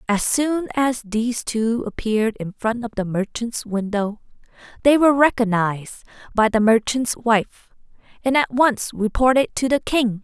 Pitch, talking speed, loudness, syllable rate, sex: 230 Hz, 150 wpm, -20 LUFS, 4.5 syllables/s, female